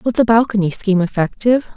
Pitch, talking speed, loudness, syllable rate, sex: 210 Hz, 170 wpm, -16 LUFS, 6.7 syllables/s, female